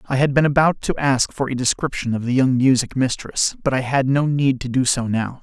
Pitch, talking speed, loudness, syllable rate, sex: 130 Hz, 255 wpm, -19 LUFS, 5.4 syllables/s, male